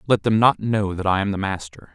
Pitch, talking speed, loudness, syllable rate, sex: 100 Hz, 280 wpm, -20 LUFS, 5.6 syllables/s, male